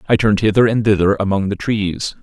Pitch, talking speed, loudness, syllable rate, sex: 105 Hz, 215 wpm, -16 LUFS, 5.9 syllables/s, male